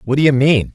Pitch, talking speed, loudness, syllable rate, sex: 135 Hz, 320 wpm, -14 LUFS, 5.6 syllables/s, male